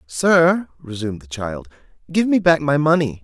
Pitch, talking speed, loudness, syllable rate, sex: 140 Hz, 165 wpm, -18 LUFS, 4.6 syllables/s, male